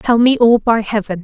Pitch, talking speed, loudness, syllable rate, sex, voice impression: 220 Hz, 245 wpm, -13 LUFS, 5.0 syllables/s, female, feminine, slightly adult-like, friendly, slightly kind